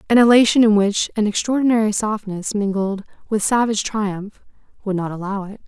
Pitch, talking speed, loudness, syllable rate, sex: 210 Hz, 160 wpm, -18 LUFS, 5.5 syllables/s, female